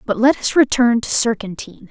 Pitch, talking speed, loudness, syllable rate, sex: 230 Hz, 190 wpm, -16 LUFS, 5.5 syllables/s, female